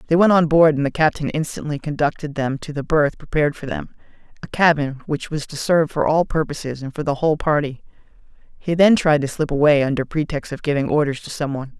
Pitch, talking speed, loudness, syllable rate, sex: 150 Hz, 220 wpm, -19 LUFS, 6.1 syllables/s, male